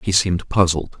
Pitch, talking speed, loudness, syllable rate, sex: 90 Hz, 180 wpm, -18 LUFS, 5.7 syllables/s, male